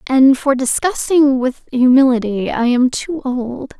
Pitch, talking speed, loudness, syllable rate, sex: 260 Hz, 140 wpm, -15 LUFS, 3.9 syllables/s, female